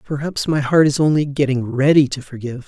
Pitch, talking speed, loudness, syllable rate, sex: 140 Hz, 200 wpm, -17 LUFS, 5.7 syllables/s, male